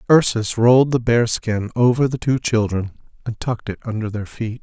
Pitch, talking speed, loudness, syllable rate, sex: 115 Hz, 195 wpm, -19 LUFS, 5.2 syllables/s, male